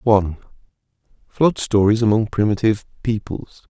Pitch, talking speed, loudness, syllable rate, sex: 110 Hz, 95 wpm, -19 LUFS, 5.6 syllables/s, male